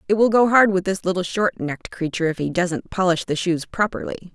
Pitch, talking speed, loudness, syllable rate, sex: 185 Hz, 235 wpm, -21 LUFS, 5.8 syllables/s, female